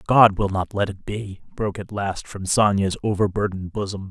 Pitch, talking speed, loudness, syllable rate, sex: 100 Hz, 190 wpm, -22 LUFS, 5.3 syllables/s, male